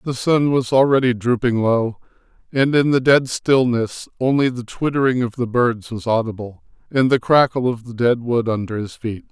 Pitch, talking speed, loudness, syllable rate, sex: 120 Hz, 185 wpm, -18 LUFS, 4.9 syllables/s, male